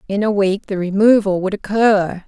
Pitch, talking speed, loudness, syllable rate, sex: 200 Hz, 185 wpm, -16 LUFS, 4.8 syllables/s, female